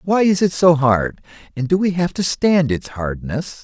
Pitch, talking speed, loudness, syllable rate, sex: 155 Hz, 215 wpm, -18 LUFS, 4.4 syllables/s, male